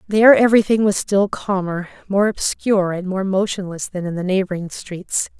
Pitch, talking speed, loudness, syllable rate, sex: 190 Hz, 165 wpm, -18 LUFS, 5.2 syllables/s, female